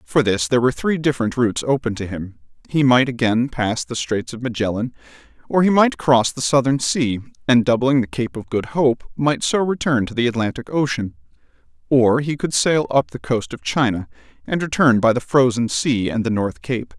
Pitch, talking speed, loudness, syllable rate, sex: 125 Hz, 205 wpm, -19 LUFS, 5.2 syllables/s, male